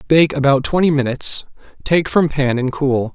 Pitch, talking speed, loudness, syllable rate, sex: 145 Hz, 170 wpm, -16 LUFS, 5.0 syllables/s, male